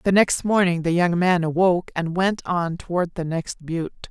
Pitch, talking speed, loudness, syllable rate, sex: 175 Hz, 205 wpm, -22 LUFS, 4.9 syllables/s, female